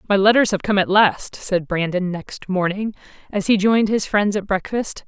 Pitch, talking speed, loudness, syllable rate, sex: 200 Hz, 200 wpm, -19 LUFS, 4.9 syllables/s, female